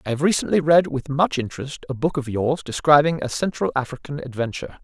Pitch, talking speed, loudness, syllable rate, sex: 140 Hz, 200 wpm, -21 LUFS, 6.1 syllables/s, male